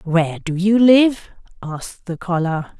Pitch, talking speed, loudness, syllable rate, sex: 185 Hz, 150 wpm, -17 LUFS, 4.3 syllables/s, female